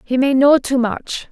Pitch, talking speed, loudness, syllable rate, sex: 265 Hz, 230 wpm, -15 LUFS, 4.2 syllables/s, female